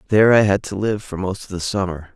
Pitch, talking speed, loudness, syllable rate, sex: 100 Hz, 280 wpm, -19 LUFS, 6.3 syllables/s, male